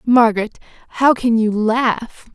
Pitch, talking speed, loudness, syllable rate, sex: 230 Hz, 105 wpm, -16 LUFS, 3.9 syllables/s, female